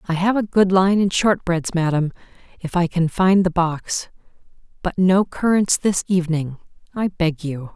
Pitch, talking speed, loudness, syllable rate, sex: 180 Hz, 170 wpm, -19 LUFS, 4.5 syllables/s, female